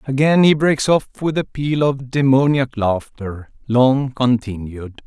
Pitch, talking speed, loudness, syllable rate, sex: 130 Hz, 140 wpm, -17 LUFS, 3.9 syllables/s, male